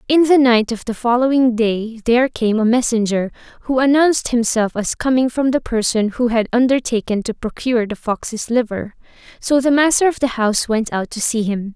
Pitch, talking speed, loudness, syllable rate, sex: 240 Hz, 195 wpm, -17 LUFS, 5.2 syllables/s, female